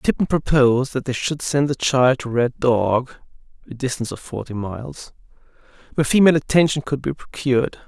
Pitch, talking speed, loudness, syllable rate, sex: 130 Hz, 150 wpm, -20 LUFS, 5.7 syllables/s, male